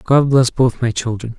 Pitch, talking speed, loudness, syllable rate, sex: 125 Hz, 215 wpm, -16 LUFS, 4.7 syllables/s, male